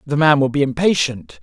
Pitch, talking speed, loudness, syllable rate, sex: 140 Hz, 210 wpm, -17 LUFS, 5.3 syllables/s, male